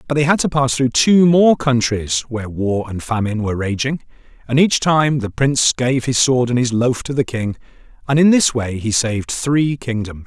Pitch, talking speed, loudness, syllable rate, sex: 125 Hz, 215 wpm, -17 LUFS, 5.0 syllables/s, male